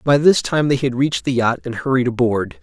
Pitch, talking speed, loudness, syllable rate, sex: 130 Hz, 250 wpm, -18 LUFS, 5.6 syllables/s, male